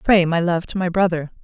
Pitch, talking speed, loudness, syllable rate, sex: 175 Hz, 250 wpm, -19 LUFS, 5.6 syllables/s, female